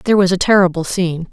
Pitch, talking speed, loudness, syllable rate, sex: 180 Hz, 225 wpm, -14 LUFS, 7.1 syllables/s, female